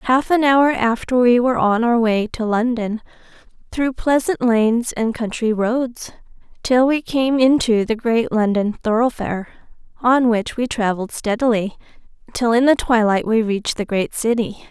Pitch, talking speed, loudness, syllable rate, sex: 235 Hz, 160 wpm, -18 LUFS, 4.8 syllables/s, female